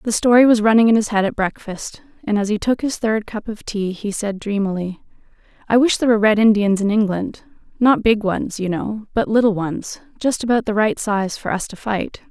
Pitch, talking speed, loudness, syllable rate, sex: 215 Hz, 225 wpm, -18 LUFS, 5.3 syllables/s, female